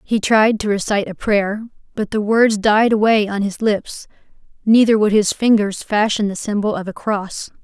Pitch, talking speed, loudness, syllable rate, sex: 210 Hz, 180 wpm, -17 LUFS, 4.7 syllables/s, female